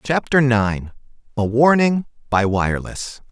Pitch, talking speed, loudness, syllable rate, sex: 125 Hz, 90 wpm, -18 LUFS, 4.1 syllables/s, male